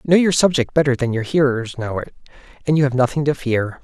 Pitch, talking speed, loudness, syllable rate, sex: 135 Hz, 235 wpm, -18 LUFS, 5.9 syllables/s, male